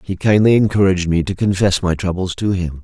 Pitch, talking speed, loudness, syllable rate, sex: 95 Hz, 210 wpm, -16 LUFS, 5.9 syllables/s, male